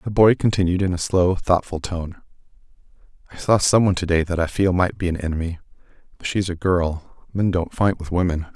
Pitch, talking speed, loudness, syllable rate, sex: 90 Hz, 210 wpm, -21 LUFS, 5.7 syllables/s, male